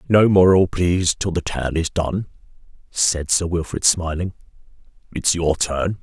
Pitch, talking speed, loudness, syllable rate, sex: 85 Hz, 150 wpm, -19 LUFS, 4.3 syllables/s, male